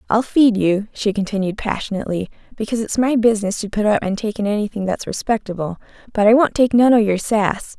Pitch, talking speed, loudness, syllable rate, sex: 215 Hz, 210 wpm, -18 LUFS, 6.1 syllables/s, female